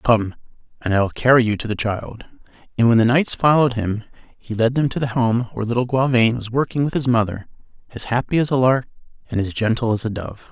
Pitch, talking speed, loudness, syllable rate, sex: 120 Hz, 230 wpm, -19 LUFS, 5.9 syllables/s, male